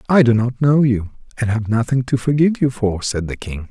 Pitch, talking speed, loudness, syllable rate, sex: 120 Hz, 245 wpm, -18 LUFS, 5.5 syllables/s, male